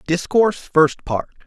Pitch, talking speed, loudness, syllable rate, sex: 165 Hz, 125 wpm, -18 LUFS, 4.3 syllables/s, male